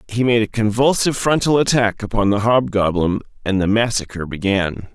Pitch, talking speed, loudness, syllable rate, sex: 110 Hz, 145 wpm, -18 LUFS, 5.4 syllables/s, male